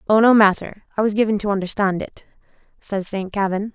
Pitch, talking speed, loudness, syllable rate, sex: 205 Hz, 190 wpm, -19 LUFS, 5.9 syllables/s, female